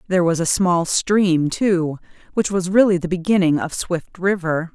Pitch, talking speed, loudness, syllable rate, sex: 180 Hz, 175 wpm, -19 LUFS, 4.5 syllables/s, female